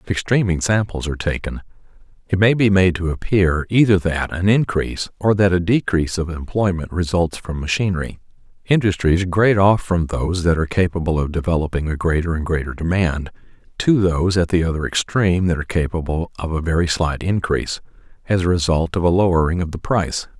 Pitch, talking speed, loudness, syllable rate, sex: 90 Hz, 180 wpm, -19 LUFS, 5.9 syllables/s, male